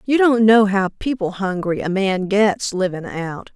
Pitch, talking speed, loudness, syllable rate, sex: 200 Hz, 185 wpm, -18 LUFS, 4.2 syllables/s, female